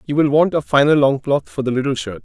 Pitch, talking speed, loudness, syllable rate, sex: 140 Hz, 270 wpm, -17 LUFS, 6.2 syllables/s, male